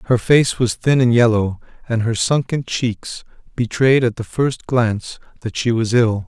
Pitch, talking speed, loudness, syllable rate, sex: 115 Hz, 180 wpm, -17 LUFS, 4.4 syllables/s, male